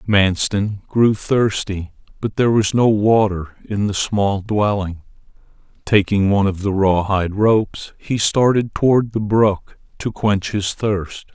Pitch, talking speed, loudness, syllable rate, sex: 105 Hz, 145 wpm, -18 LUFS, 4.0 syllables/s, male